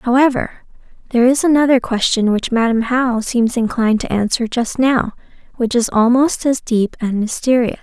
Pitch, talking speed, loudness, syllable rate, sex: 240 Hz, 160 wpm, -16 LUFS, 5.0 syllables/s, female